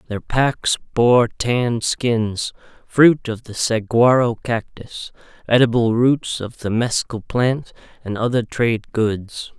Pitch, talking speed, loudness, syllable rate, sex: 115 Hz, 125 wpm, -19 LUFS, 3.5 syllables/s, male